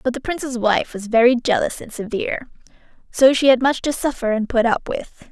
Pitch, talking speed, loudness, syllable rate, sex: 245 Hz, 215 wpm, -19 LUFS, 5.5 syllables/s, female